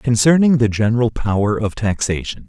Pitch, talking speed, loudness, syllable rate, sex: 115 Hz, 145 wpm, -17 LUFS, 5.4 syllables/s, male